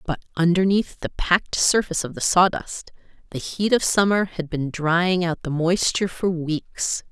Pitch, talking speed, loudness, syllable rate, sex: 175 Hz, 170 wpm, -21 LUFS, 4.5 syllables/s, female